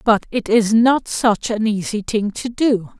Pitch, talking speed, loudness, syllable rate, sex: 215 Hz, 200 wpm, -18 LUFS, 3.9 syllables/s, female